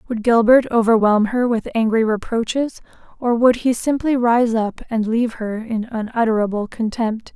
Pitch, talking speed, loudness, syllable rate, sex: 230 Hz, 155 wpm, -18 LUFS, 4.8 syllables/s, female